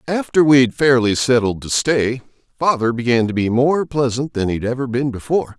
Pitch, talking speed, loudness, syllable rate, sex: 125 Hz, 185 wpm, -17 LUFS, 5.1 syllables/s, male